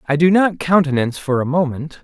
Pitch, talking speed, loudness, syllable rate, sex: 155 Hz, 205 wpm, -17 LUFS, 6.0 syllables/s, male